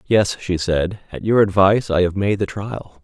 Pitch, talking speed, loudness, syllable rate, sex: 95 Hz, 215 wpm, -19 LUFS, 4.7 syllables/s, male